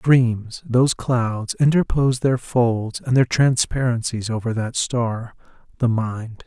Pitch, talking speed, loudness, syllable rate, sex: 120 Hz, 130 wpm, -20 LUFS, 3.7 syllables/s, male